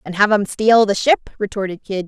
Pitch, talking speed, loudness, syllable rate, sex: 205 Hz, 230 wpm, -17 LUFS, 5.3 syllables/s, female